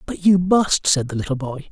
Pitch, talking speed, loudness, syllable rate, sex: 160 Hz, 245 wpm, -18 LUFS, 5.1 syllables/s, male